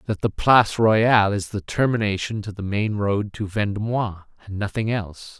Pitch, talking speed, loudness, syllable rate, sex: 105 Hz, 180 wpm, -21 LUFS, 5.1 syllables/s, male